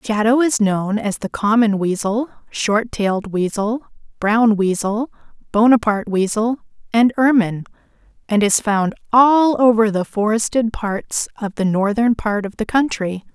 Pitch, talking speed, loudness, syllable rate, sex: 220 Hz, 140 wpm, -17 LUFS, 4.4 syllables/s, female